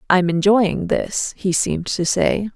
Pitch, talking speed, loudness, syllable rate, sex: 195 Hz, 165 wpm, -19 LUFS, 3.9 syllables/s, female